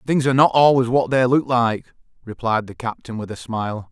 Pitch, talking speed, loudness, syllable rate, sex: 120 Hz, 215 wpm, -19 LUFS, 5.6 syllables/s, male